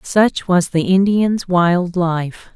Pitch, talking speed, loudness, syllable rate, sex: 180 Hz, 140 wpm, -16 LUFS, 2.9 syllables/s, female